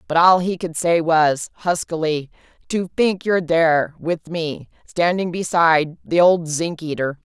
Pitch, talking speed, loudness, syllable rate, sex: 165 Hz, 140 wpm, -19 LUFS, 4.3 syllables/s, female